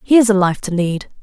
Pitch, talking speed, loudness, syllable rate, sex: 200 Hz, 245 wpm, -16 LUFS, 5.9 syllables/s, female